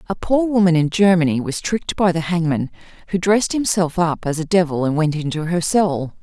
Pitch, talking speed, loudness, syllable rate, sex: 175 Hz, 210 wpm, -18 LUFS, 5.5 syllables/s, female